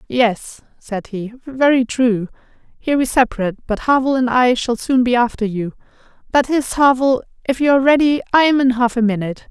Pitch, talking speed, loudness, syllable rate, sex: 245 Hz, 190 wpm, -16 LUFS, 5.8 syllables/s, female